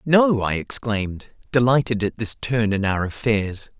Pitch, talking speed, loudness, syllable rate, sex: 115 Hz, 160 wpm, -21 LUFS, 4.4 syllables/s, male